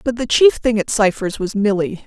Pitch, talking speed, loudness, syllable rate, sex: 215 Hz, 235 wpm, -16 LUFS, 5.1 syllables/s, female